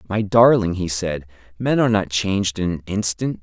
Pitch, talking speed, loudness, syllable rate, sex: 95 Hz, 195 wpm, -19 LUFS, 5.2 syllables/s, male